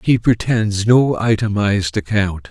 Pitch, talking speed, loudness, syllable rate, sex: 105 Hz, 120 wpm, -16 LUFS, 4.2 syllables/s, male